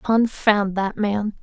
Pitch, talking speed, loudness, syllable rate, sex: 205 Hz, 125 wpm, -20 LUFS, 3.1 syllables/s, female